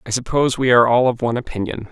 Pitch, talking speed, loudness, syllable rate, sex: 120 Hz, 250 wpm, -17 LUFS, 7.8 syllables/s, male